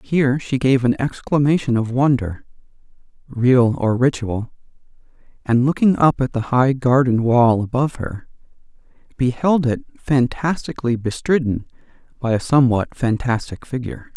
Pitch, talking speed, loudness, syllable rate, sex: 130 Hz, 125 wpm, -18 LUFS, 4.8 syllables/s, male